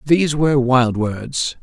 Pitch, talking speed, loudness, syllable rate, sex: 135 Hz, 145 wpm, -17 LUFS, 4.1 syllables/s, male